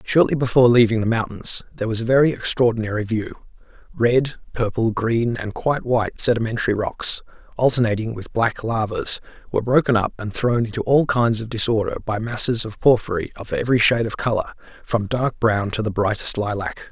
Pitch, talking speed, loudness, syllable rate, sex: 115 Hz, 175 wpm, -20 LUFS, 5.6 syllables/s, male